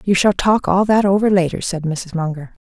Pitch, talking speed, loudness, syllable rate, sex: 185 Hz, 225 wpm, -17 LUFS, 5.2 syllables/s, female